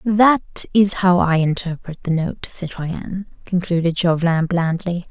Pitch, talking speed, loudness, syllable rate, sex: 175 Hz, 130 wpm, -19 LUFS, 4.3 syllables/s, female